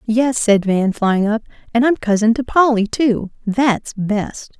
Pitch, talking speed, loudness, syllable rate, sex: 225 Hz, 155 wpm, -17 LUFS, 3.8 syllables/s, female